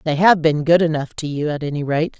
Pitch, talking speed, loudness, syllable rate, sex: 155 Hz, 275 wpm, -18 LUFS, 5.8 syllables/s, female